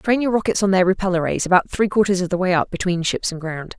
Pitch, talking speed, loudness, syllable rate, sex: 185 Hz, 285 wpm, -19 LUFS, 6.4 syllables/s, female